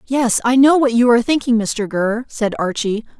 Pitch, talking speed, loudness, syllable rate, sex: 235 Hz, 205 wpm, -16 LUFS, 5.0 syllables/s, female